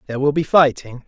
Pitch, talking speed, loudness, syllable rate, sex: 140 Hz, 225 wpm, -16 LUFS, 6.7 syllables/s, male